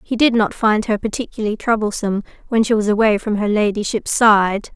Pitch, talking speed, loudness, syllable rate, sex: 215 Hz, 190 wpm, -17 LUFS, 5.7 syllables/s, female